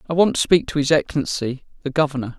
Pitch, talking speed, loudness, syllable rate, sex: 150 Hz, 225 wpm, -20 LUFS, 6.9 syllables/s, male